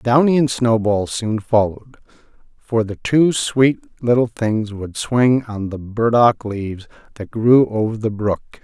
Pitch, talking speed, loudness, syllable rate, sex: 115 Hz, 155 wpm, -18 LUFS, 4.0 syllables/s, male